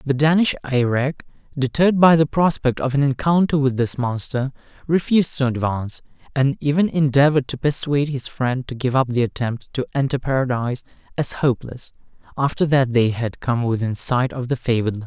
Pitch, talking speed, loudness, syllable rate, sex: 135 Hz, 175 wpm, -20 LUFS, 5.6 syllables/s, male